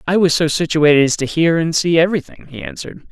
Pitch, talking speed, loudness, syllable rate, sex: 160 Hz, 230 wpm, -15 LUFS, 6.6 syllables/s, male